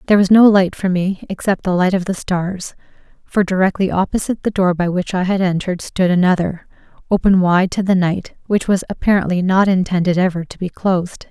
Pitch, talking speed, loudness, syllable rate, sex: 185 Hz, 200 wpm, -16 LUFS, 5.7 syllables/s, female